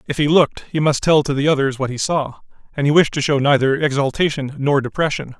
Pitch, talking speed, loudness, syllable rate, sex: 140 Hz, 235 wpm, -17 LUFS, 6.1 syllables/s, male